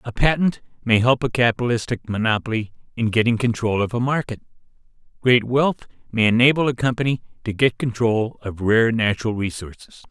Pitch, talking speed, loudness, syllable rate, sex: 115 Hz, 155 wpm, -20 LUFS, 5.6 syllables/s, male